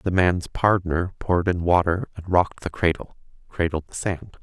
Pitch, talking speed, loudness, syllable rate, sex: 90 Hz, 165 wpm, -23 LUFS, 4.9 syllables/s, male